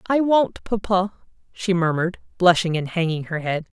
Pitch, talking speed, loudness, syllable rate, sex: 180 Hz, 160 wpm, -21 LUFS, 5.0 syllables/s, female